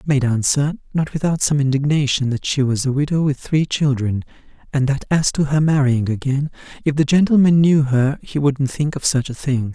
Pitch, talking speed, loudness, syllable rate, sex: 140 Hz, 210 wpm, -18 LUFS, 5.3 syllables/s, male